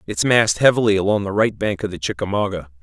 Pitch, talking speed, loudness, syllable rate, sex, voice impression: 100 Hz, 210 wpm, -18 LUFS, 6.5 syllables/s, male, very masculine, very middle-aged, very thick, tensed, very powerful, slightly bright, slightly hard, slightly muffled, fluent, slightly raspy, cool, very intellectual, refreshing, sincere, calm, very friendly, reassuring, unique, elegant, very wild, sweet, lively, kind, slightly intense